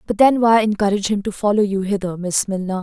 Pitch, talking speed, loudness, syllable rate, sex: 205 Hz, 235 wpm, -18 LUFS, 6.3 syllables/s, female